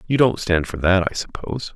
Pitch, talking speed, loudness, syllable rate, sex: 100 Hz, 240 wpm, -20 LUFS, 5.8 syllables/s, male